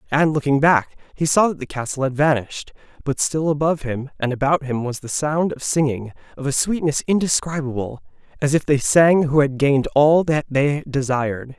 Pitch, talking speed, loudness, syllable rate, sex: 145 Hz, 190 wpm, -19 LUFS, 5.3 syllables/s, male